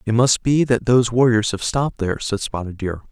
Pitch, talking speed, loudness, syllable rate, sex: 115 Hz, 230 wpm, -19 LUFS, 5.8 syllables/s, male